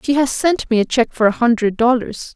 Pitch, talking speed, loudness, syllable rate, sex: 240 Hz, 255 wpm, -16 LUFS, 5.3 syllables/s, female